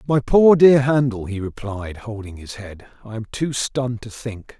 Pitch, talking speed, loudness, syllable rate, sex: 120 Hz, 195 wpm, -18 LUFS, 4.5 syllables/s, male